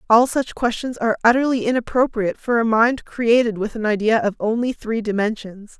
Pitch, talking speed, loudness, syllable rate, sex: 225 Hz, 175 wpm, -19 LUFS, 5.5 syllables/s, female